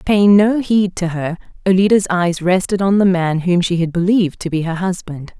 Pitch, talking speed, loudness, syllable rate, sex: 185 Hz, 210 wpm, -16 LUFS, 5.1 syllables/s, female